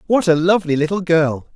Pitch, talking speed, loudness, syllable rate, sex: 170 Hz, 195 wpm, -16 LUFS, 5.8 syllables/s, male